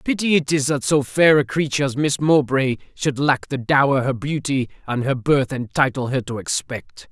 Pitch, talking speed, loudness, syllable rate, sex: 135 Hz, 200 wpm, -20 LUFS, 4.9 syllables/s, male